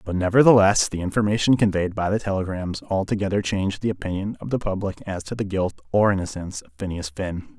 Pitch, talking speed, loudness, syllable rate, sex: 95 Hz, 190 wpm, -22 LUFS, 6.3 syllables/s, male